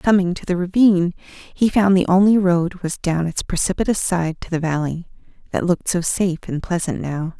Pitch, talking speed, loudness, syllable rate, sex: 180 Hz, 195 wpm, -19 LUFS, 5.3 syllables/s, female